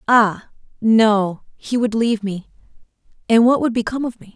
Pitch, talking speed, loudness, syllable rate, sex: 225 Hz, 165 wpm, -18 LUFS, 5.1 syllables/s, female